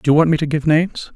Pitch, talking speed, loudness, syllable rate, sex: 155 Hz, 365 wpm, -17 LUFS, 7.2 syllables/s, male